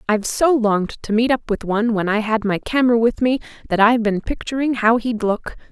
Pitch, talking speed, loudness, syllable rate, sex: 225 Hz, 230 wpm, -19 LUFS, 5.9 syllables/s, female